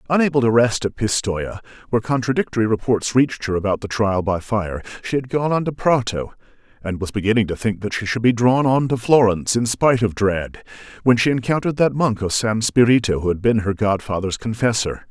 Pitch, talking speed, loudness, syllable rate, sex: 115 Hz, 205 wpm, -19 LUFS, 5.9 syllables/s, male